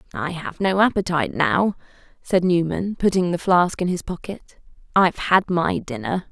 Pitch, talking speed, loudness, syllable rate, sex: 175 Hz, 160 wpm, -21 LUFS, 5.0 syllables/s, female